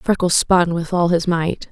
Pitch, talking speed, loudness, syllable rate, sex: 175 Hz, 210 wpm, -17 LUFS, 4.2 syllables/s, female